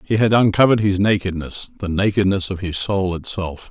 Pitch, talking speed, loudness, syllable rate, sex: 95 Hz, 160 wpm, -19 LUFS, 5.5 syllables/s, male